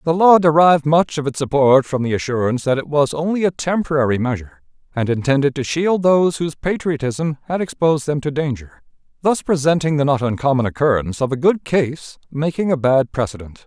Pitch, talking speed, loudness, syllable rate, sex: 145 Hz, 190 wpm, -18 LUFS, 5.9 syllables/s, male